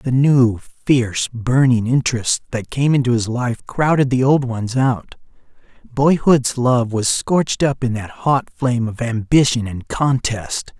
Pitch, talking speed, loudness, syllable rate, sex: 125 Hz, 155 wpm, -17 LUFS, 4.2 syllables/s, male